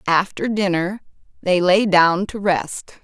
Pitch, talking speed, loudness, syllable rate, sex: 185 Hz, 140 wpm, -18 LUFS, 3.7 syllables/s, female